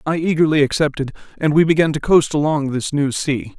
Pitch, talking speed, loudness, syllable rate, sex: 150 Hz, 200 wpm, -17 LUFS, 5.6 syllables/s, male